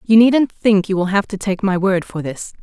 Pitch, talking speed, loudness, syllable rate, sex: 195 Hz, 275 wpm, -17 LUFS, 4.9 syllables/s, female